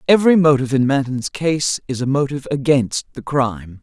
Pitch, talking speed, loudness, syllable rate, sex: 135 Hz, 175 wpm, -18 LUFS, 5.8 syllables/s, female